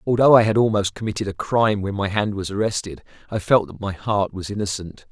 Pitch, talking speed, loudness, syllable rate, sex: 105 Hz, 225 wpm, -21 LUFS, 5.9 syllables/s, male